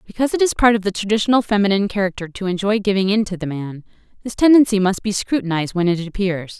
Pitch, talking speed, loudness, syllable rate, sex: 200 Hz, 220 wpm, -18 LUFS, 6.9 syllables/s, female